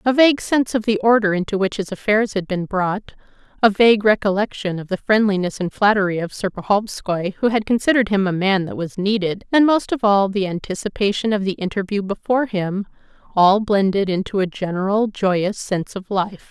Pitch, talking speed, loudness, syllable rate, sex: 200 Hz, 185 wpm, -19 LUFS, 5.5 syllables/s, female